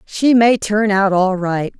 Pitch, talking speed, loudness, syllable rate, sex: 205 Hz, 200 wpm, -15 LUFS, 3.6 syllables/s, female